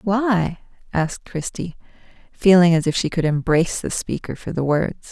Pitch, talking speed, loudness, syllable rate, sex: 175 Hz, 165 wpm, -20 LUFS, 4.9 syllables/s, female